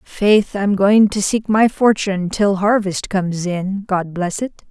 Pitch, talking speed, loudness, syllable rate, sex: 200 Hz, 180 wpm, -17 LUFS, 4.0 syllables/s, female